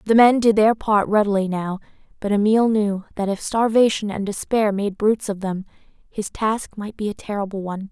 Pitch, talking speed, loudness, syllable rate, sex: 205 Hz, 195 wpm, -20 LUFS, 5.3 syllables/s, female